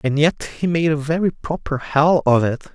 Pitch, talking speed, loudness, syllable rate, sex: 150 Hz, 220 wpm, -19 LUFS, 4.8 syllables/s, male